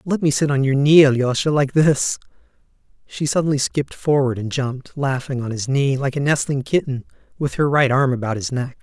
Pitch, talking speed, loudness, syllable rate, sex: 135 Hz, 205 wpm, -19 LUFS, 5.5 syllables/s, male